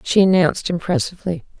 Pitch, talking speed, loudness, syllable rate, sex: 175 Hz, 115 wpm, -18 LUFS, 6.5 syllables/s, female